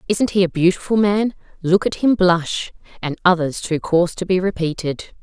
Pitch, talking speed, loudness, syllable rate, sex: 180 Hz, 185 wpm, -18 LUFS, 5.0 syllables/s, female